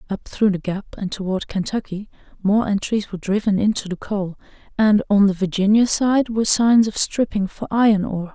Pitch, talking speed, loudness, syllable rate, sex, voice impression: 205 Hz, 185 wpm, -19 LUFS, 5.4 syllables/s, female, very feminine, very adult-like, slightly middle-aged, very thin, very relaxed, very weak, very dark, soft, slightly muffled, fluent, very cute, intellectual, sincere, very calm, very friendly, very reassuring, very unique, elegant, very sweet, lively, kind, slightly modest